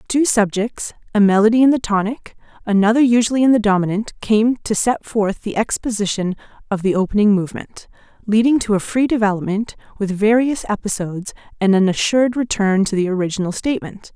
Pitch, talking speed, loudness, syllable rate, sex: 210 Hz, 160 wpm, -17 LUFS, 5.8 syllables/s, female